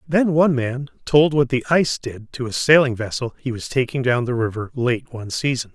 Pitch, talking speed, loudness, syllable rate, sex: 130 Hz, 220 wpm, -20 LUFS, 5.4 syllables/s, male